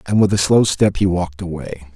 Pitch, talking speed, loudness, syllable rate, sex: 90 Hz, 245 wpm, -17 LUFS, 5.6 syllables/s, male